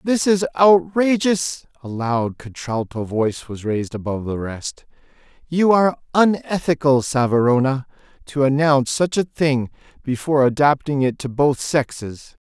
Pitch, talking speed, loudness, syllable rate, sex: 145 Hz, 130 wpm, -19 LUFS, 4.6 syllables/s, male